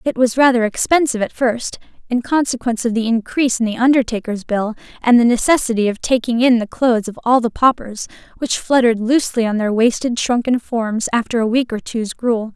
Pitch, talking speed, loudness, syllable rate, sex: 235 Hz, 195 wpm, -17 LUFS, 5.8 syllables/s, female